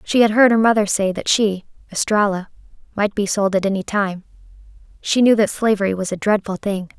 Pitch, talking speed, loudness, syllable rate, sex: 205 Hz, 190 wpm, -18 LUFS, 5.4 syllables/s, female